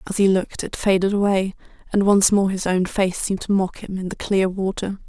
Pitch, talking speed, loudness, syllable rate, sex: 195 Hz, 235 wpm, -21 LUFS, 5.7 syllables/s, female